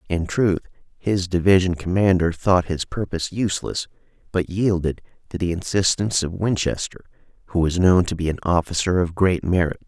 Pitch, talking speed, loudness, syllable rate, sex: 90 Hz, 160 wpm, -21 LUFS, 5.3 syllables/s, male